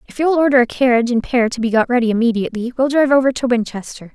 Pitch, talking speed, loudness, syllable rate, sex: 245 Hz, 245 wpm, -16 LUFS, 7.4 syllables/s, female